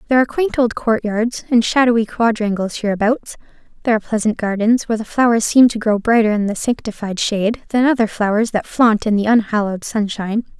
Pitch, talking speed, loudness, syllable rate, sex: 220 Hz, 185 wpm, -17 LUFS, 6.1 syllables/s, female